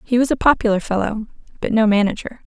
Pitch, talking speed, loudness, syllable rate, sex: 220 Hz, 190 wpm, -18 LUFS, 6.4 syllables/s, female